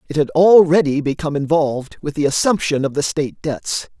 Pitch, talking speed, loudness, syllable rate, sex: 150 Hz, 180 wpm, -17 LUFS, 5.7 syllables/s, male